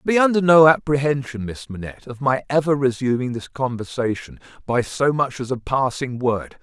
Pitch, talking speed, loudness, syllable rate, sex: 130 Hz, 170 wpm, -20 LUFS, 5.2 syllables/s, male